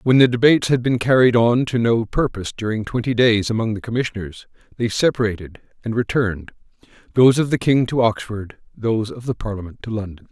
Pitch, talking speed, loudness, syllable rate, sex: 115 Hz, 185 wpm, -19 LUFS, 6.1 syllables/s, male